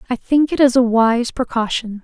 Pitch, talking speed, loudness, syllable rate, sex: 240 Hz, 205 wpm, -16 LUFS, 4.9 syllables/s, female